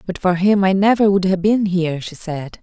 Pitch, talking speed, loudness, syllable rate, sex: 185 Hz, 250 wpm, -17 LUFS, 5.2 syllables/s, female